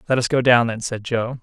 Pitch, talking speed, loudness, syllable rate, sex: 120 Hz, 295 wpm, -19 LUFS, 5.6 syllables/s, male